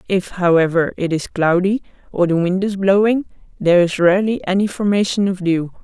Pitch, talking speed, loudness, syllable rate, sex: 185 Hz, 175 wpm, -17 LUFS, 5.5 syllables/s, female